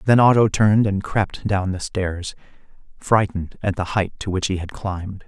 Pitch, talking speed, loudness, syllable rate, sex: 100 Hz, 195 wpm, -21 LUFS, 4.9 syllables/s, male